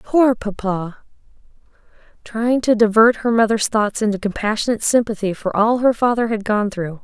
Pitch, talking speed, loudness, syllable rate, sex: 220 Hz, 145 wpm, -18 LUFS, 5.1 syllables/s, female